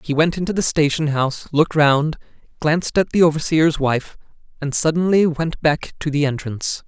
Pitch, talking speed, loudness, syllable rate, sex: 155 Hz, 175 wpm, -19 LUFS, 5.3 syllables/s, male